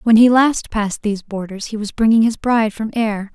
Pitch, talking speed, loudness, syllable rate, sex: 220 Hz, 235 wpm, -17 LUFS, 5.6 syllables/s, female